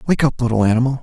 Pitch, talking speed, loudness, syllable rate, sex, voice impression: 125 Hz, 235 wpm, -17 LUFS, 8.1 syllables/s, male, very masculine, very adult-like, slightly old, slightly tensed, slightly powerful, bright, soft, slightly muffled, fluent, slightly raspy, very cool, very intellectual, very sincere, very calm, very mature, very friendly, very reassuring, unique, very elegant, wild, sweet, lively, very kind